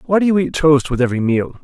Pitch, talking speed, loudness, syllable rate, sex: 150 Hz, 295 wpm, -16 LUFS, 6.8 syllables/s, male